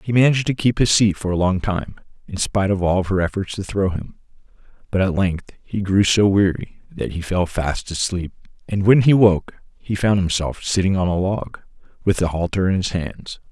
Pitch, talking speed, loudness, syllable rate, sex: 95 Hz, 215 wpm, -19 LUFS, 5.0 syllables/s, male